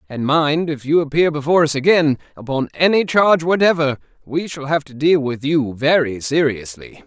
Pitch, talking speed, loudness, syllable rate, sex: 145 Hz, 180 wpm, -17 LUFS, 5.2 syllables/s, male